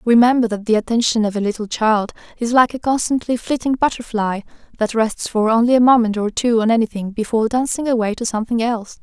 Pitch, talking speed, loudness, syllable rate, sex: 230 Hz, 200 wpm, -18 LUFS, 6.1 syllables/s, female